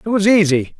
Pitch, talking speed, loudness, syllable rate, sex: 185 Hz, 225 wpm, -14 LUFS, 5.9 syllables/s, male